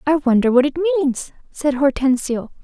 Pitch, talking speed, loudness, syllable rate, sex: 280 Hz, 160 wpm, -18 LUFS, 4.5 syllables/s, female